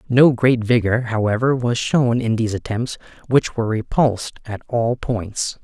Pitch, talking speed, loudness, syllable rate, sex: 115 Hz, 160 wpm, -19 LUFS, 4.7 syllables/s, male